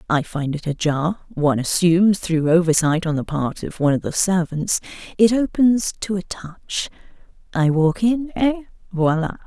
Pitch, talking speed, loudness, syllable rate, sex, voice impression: 180 Hz, 145 wpm, -20 LUFS, 4.7 syllables/s, female, very feminine, very adult-like, slightly unique, slightly elegant, slightly intense